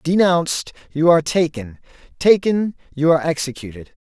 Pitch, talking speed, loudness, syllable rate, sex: 160 Hz, 120 wpm, -18 LUFS, 5.4 syllables/s, male